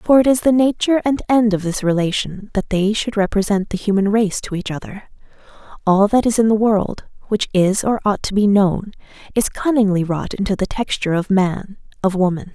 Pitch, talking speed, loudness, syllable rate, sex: 205 Hz, 205 wpm, -18 LUFS, 5.3 syllables/s, female